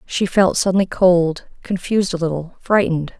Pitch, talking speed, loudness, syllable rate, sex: 180 Hz, 150 wpm, -18 LUFS, 5.3 syllables/s, female